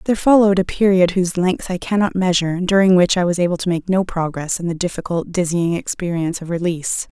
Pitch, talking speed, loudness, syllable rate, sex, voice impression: 180 Hz, 215 wpm, -18 LUFS, 6.5 syllables/s, female, feminine, adult-like, slightly middle-aged, thin, tensed, slightly weak, slightly bright, hard, clear, fluent, cute, intellectual, slightly refreshing, sincere, calm, friendly, slightly reassuring, unique, slightly elegant, slightly sweet, lively, intense, sharp, slightly modest